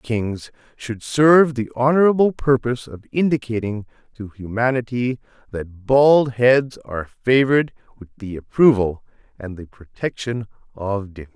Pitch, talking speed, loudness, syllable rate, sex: 120 Hz, 120 wpm, -19 LUFS, 4.8 syllables/s, male